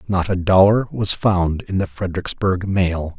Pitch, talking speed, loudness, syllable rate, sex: 95 Hz, 170 wpm, -18 LUFS, 4.4 syllables/s, male